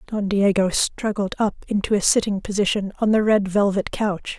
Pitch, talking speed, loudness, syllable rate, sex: 200 Hz, 180 wpm, -21 LUFS, 5.0 syllables/s, female